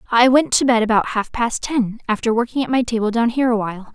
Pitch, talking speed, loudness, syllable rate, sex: 230 Hz, 245 wpm, -18 LUFS, 6.3 syllables/s, female